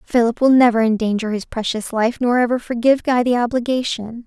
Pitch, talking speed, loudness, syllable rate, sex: 235 Hz, 185 wpm, -18 LUFS, 5.8 syllables/s, female